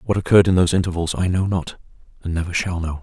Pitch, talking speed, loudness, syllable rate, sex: 90 Hz, 240 wpm, -19 LUFS, 7.0 syllables/s, male